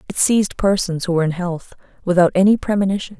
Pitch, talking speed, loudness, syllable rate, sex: 185 Hz, 190 wpm, -17 LUFS, 6.7 syllables/s, female